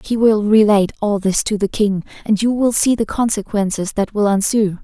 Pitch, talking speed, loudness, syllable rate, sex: 210 Hz, 210 wpm, -16 LUFS, 5.2 syllables/s, female